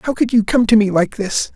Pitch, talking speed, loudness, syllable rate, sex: 215 Hz, 310 wpm, -15 LUFS, 5.3 syllables/s, male